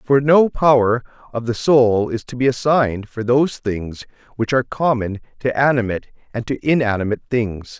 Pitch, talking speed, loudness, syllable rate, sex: 120 Hz, 170 wpm, -18 LUFS, 5.2 syllables/s, male